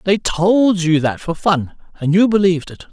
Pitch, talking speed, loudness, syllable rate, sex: 175 Hz, 205 wpm, -16 LUFS, 4.7 syllables/s, male